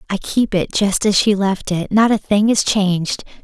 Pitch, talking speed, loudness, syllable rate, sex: 200 Hz, 225 wpm, -16 LUFS, 4.6 syllables/s, female